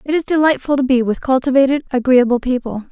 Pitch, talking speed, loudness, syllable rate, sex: 260 Hz, 185 wpm, -15 LUFS, 6.3 syllables/s, female